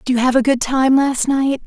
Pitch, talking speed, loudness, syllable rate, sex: 260 Hz, 290 wpm, -16 LUFS, 5.2 syllables/s, female